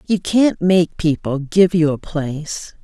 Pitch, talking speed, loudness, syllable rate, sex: 165 Hz, 170 wpm, -17 LUFS, 3.7 syllables/s, female